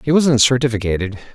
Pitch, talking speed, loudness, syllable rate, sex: 120 Hz, 135 wpm, -16 LUFS, 6.4 syllables/s, male